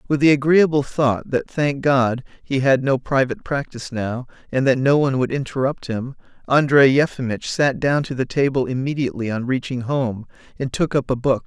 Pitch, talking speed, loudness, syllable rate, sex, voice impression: 135 Hz, 190 wpm, -20 LUFS, 5.3 syllables/s, male, masculine, very adult-like, middle-aged, thick, slightly tensed, slightly weak, slightly bright, slightly soft, slightly clear, slightly fluent, slightly cool, slightly intellectual, refreshing, slightly calm, friendly, slightly reassuring, slightly elegant, very kind, slightly modest